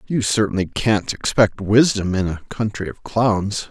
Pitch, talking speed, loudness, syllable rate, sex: 105 Hz, 160 wpm, -19 LUFS, 4.3 syllables/s, male